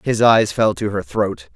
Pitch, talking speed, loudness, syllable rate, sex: 105 Hz, 230 wpm, -17 LUFS, 4.3 syllables/s, male